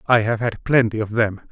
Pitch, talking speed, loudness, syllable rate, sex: 115 Hz, 240 wpm, -20 LUFS, 5.4 syllables/s, male